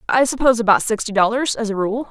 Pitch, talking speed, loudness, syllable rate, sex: 225 Hz, 230 wpm, -18 LUFS, 6.7 syllables/s, female